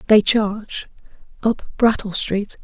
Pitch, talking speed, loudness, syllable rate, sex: 215 Hz, 115 wpm, -20 LUFS, 3.9 syllables/s, female